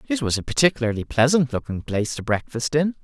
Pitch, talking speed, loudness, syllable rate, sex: 130 Hz, 200 wpm, -22 LUFS, 6.4 syllables/s, male